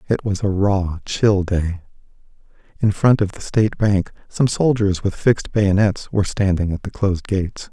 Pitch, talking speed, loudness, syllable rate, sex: 100 Hz, 180 wpm, -19 LUFS, 4.9 syllables/s, male